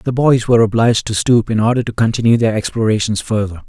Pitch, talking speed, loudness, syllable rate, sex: 115 Hz, 210 wpm, -15 LUFS, 6.4 syllables/s, male